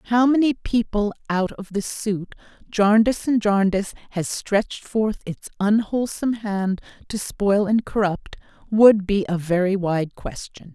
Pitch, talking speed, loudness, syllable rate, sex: 205 Hz, 145 wpm, -21 LUFS, 4.4 syllables/s, female